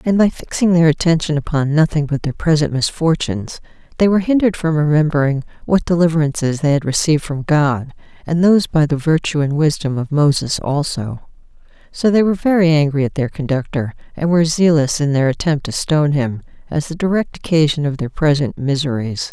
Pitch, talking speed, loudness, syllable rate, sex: 150 Hz, 180 wpm, -16 LUFS, 5.7 syllables/s, female